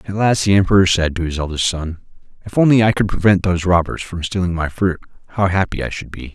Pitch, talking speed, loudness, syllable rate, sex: 90 Hz, 235 wpm, -17 LUFS, 6.3 syllables/s, male